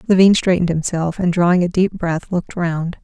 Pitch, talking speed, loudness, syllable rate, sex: 175 Hz, 195 wpm, -17 LUFS, 5.7 syllables/s, female